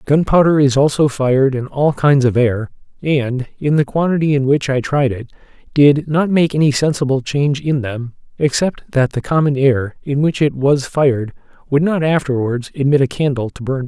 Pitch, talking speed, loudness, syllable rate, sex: 140 Hz, 200 wpm, -16 LUFS, 5.1 syllables/s, male